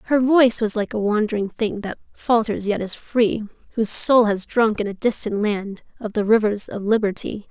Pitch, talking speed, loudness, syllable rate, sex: 215 Hz, 200 wpm, -20 LUFS, 5.1 syllables/s, female